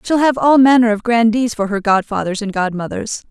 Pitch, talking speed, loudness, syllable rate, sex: 225 Hz, 200 wpm, -15 LUFS, 5.4 syllables/s, female